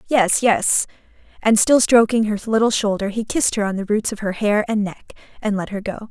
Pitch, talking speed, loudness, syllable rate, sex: 215 Hz, 225 wpm, -19 LUFS, 5.5 syllables/s, female